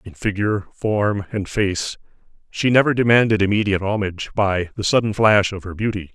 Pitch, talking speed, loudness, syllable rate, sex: 100 Hz, 165 wpm, -19 LUFS, 5.5 syllables/s, male